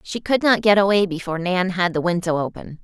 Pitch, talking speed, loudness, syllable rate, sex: 180 Hz, 235 wpm, -19 LUFS, 5.9 syllables/s, female